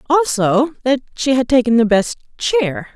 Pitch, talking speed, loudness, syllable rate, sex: 250 Hz, 160 wpm, -16 LUFS, 4.4 syllables/s, female